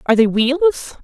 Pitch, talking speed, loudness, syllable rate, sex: 260 Hz, 175 wpm, -15 LUFS, 4.6 syllables/s, female